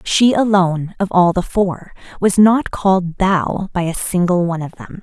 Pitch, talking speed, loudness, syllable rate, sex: 185 Hz, 190 wpm, -16 LUFS, 4.6 syllables/s, female